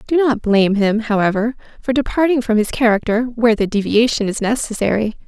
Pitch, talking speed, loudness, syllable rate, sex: 225 Hz, 170 wpm, -17 LUFS, 5.9 syllables/s, female